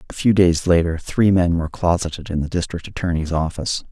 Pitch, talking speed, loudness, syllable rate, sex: 85 Hz, 200 wpm, -19 LUFS, 6.0 syllables/s, male